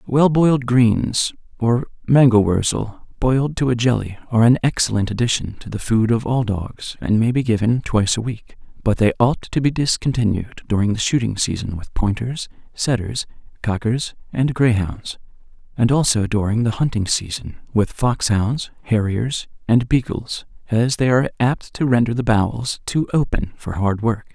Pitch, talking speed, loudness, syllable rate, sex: 115 Hz, 160 wpm, -19 LUFS, 4.8 syllables/s, male